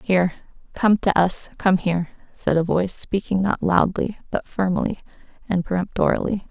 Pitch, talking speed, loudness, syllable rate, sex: 185 Hz, 150 wpm, -22 LUFS, 5.2 syllables/s, female